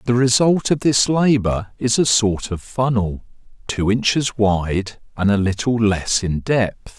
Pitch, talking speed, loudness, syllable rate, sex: 110 Hz, 165 wpm, -18 LUFS, 3.9 syllables/s, male